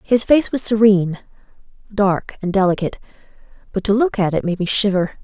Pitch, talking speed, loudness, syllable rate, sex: 200 Hz, 170 wpm, -18 LUFS, 5.8 syllables/s, female